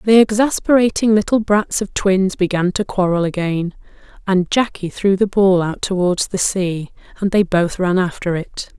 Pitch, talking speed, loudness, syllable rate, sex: 190 Hz, 170 wpm, -17 LUFS, 4.6 syllables/s, female